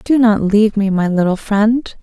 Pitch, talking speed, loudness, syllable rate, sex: 210 Hz, 210 wpm, -14 LUFS, 4.6 syllables/s, female